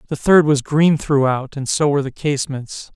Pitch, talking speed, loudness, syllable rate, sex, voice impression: 145 Hz, 205 wpm, -17 LUFS, 5.1 syllables/s, male, masculine, adult-like, slightly thick, slightly relaxed, slightly weak, slightly dark, slightly soft, muffled, fluent, slightly cool, intellectual, slightly refreshing, sincere, calm, slightly mature, slightly friendly, slightly reassuring, slightly unique, slightly elegant, lively, kind, modest